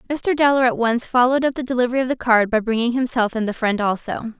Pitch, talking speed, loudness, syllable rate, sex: 245 Hz, 245 wpm, -19 LUFS, 6.5 syllables/s, female